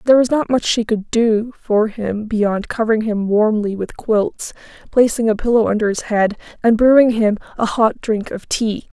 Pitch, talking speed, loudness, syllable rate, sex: 220 Hz, 195 wpm, -17 LUFS, 4.7 syllables/s, female